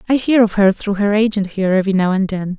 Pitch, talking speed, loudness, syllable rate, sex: 200 Hz, 280 wpm, -16 LUFS, 6.6 syllables/s, female